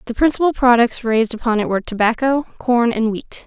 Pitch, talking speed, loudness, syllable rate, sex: 240 Hz, 190 wpm, -17 LUFS, 6.0 syllables/s, female